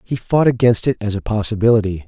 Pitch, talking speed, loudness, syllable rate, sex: 110 Hz, 205 wpm, -16 LUFS, 6.2 syllables/s, male